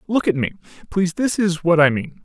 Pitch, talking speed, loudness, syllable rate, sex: 175 Hz, 215 wpm, -19 LUFS, 6.0 syllables/s, male